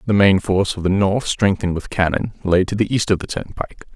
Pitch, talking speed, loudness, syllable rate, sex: 95 Hz, 245 wpm, -18 LUFS, 6.3 syllables/s, male